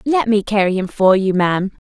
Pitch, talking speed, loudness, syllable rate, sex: 205 Hz, 225 wpm, -16 LUFS, 4.7 syllables/s, female